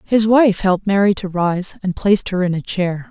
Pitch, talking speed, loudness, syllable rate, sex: 195 Hz, 230 wpm, -17 LUFS, 5.1 syllables/s, female